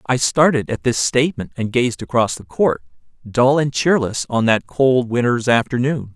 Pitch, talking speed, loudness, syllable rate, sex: 125 Hz, 165 wpm, -18 LUFS, 4.7 syllables/s, male